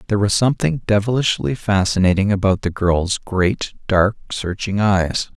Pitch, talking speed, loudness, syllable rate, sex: 100 Hz, 135 wpm, -18 LUFS, 4.7 syllables/s, male